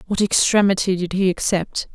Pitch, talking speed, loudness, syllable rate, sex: 190 Hz, 155 wpm, -19 LUFS, 5.2 syllables/s, female